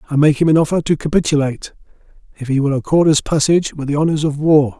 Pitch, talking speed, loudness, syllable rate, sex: 150 Hz, 215 wpm, -15 LUFS, 6.6 syllables/s, male